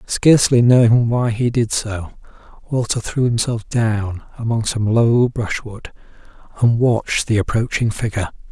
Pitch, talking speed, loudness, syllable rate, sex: 115 Hz, 135 wpm, -17 LUFS, 4.5 syllables/s, male